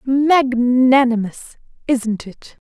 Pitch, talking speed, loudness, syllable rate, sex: 250 Hz, 70 wpm, -16 LUFS, 2.7 syllables/s, female